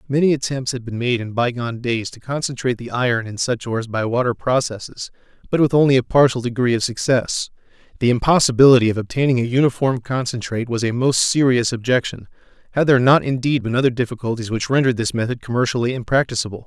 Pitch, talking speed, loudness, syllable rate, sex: 125 Hz, 185 wpm, -19 LUFS, 6.4 syllables/s, male